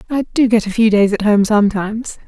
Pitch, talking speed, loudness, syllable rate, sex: 215 Hz, 235 wpm, -14 LUFS, 6.0 syllables/s, female